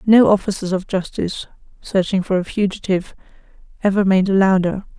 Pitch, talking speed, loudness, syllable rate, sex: 190 Hz, 145 wpm, -18 LUFS, 5.9 syllables/s, female